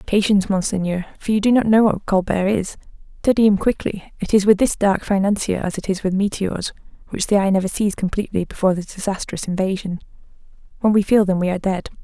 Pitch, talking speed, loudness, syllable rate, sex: 195 Hz, 200 wpm, -19 LUFS, 6.2 syllables/s, female